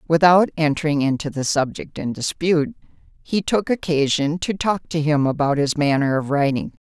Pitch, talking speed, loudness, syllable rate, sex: 155 Hz, 165 wpm, -20 LUFS, 5.1 syllables/s, female